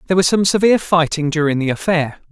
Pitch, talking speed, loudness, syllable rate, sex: 165 Hz, 210 wpm, -16 LUFS, 6.8 syllables/s, male